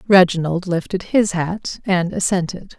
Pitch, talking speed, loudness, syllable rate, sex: 185 Hz, 130 wpm, -19 LUFS, 4.3 syllables/s, female